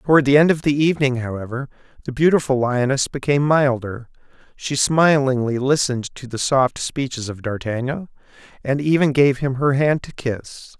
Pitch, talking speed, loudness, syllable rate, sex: 135 Hz, 160 wpm, -19 LUFS, 5.2 syllables/s, male